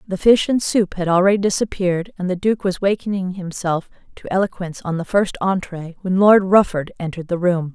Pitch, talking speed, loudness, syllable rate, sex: 185 Hz, 195 wpm, -19 LUFS, 5.6 syllables/s, female